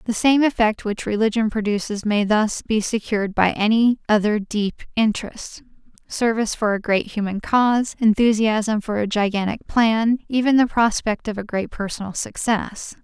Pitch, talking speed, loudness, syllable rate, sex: 220 Hz, 155 wpm, -20 LUFS, 4.9 syllables/s, female